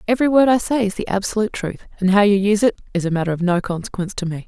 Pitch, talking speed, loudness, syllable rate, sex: 200 Hz, 280 wpm, -19 LUFS, 8.0 syllables/s, female